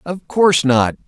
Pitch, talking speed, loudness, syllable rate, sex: 155 Hz, 165 wpm, -15 LUFS, 4.5 syllables/s, male